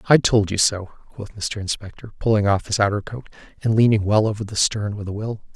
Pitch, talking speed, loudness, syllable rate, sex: 105 Hz, 225 wpm, -21 LUFS, 5.6 syllables/s, male